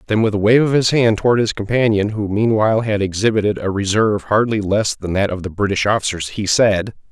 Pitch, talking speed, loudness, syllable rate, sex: 105 Hz, 220 wpm, -17 LUFS, 5.9 syllables/s, male